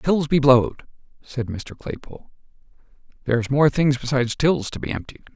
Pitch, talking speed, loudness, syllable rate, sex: 130 Hz, 155 wpm, -21 LUFS, 5.3 syllables/s, male